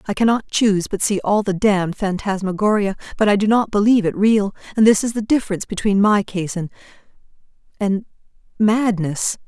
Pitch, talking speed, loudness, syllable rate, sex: 205 Hz, 160 wpm, -18 LUFS, 5.7 syllables/s, female